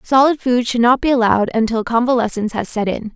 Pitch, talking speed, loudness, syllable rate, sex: 240 Hz, 210 wpm, -16 LUFS, 6.3 syllables/s, female